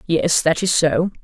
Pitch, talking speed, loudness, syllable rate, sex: 165 Hz, 195 wpm, -17 LUFS, 4.0 syllables/s, female